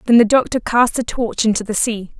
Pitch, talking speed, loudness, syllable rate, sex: 230 Hz, 245 wpm, -16 LUFS, 5.6 syllables/s, female